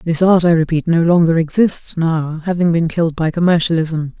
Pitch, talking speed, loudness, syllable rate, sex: 165 Hz, 185 wpm, -15 LUFS, 5.2 syllables/s, female